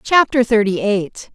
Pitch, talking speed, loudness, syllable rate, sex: 225 Hz, 135 wpm, -16 LUFS, 4.0 syllables/s, female